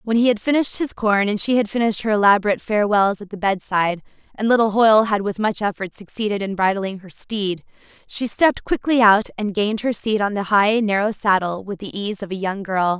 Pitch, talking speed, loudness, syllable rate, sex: 205 Hz, 220 wpm, -19 LUFS, 5.9 syllables/s, female